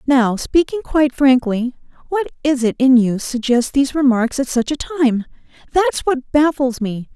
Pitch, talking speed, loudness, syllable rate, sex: 265 Hz, 170 wpm, -17 LUFS, 4.8 syllables/s, female